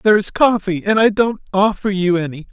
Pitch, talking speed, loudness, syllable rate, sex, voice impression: 200 Hz, 215 wpm, -16 LUFS, 5.7 syllables/s, male, masculine, adult-like, slightly bright, slightly soft, slightly halting, sincere, calm, reassuring, slightly lively, slightly sharp